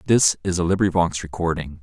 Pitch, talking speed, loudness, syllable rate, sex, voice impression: 90 Hz, 165 wpm, -21 LUFS, 5.7 syllables/s, male, very masculine, adult-like, very thick, very tensed, slightly relaxed, slightly weak, bright, soft, clear, fluent, slightly raspy, cool, very intellectual, refreshing, very sincere, very calm, very mature, friendly, reassuring, unique, elegant, slightly wild, sweet, lively, kind, slightly modest